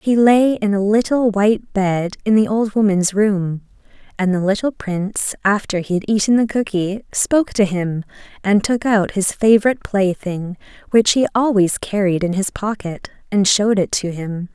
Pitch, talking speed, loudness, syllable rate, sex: 205 Hz, 175 wpm, -17 LUFS, 4.8 syllables/s, female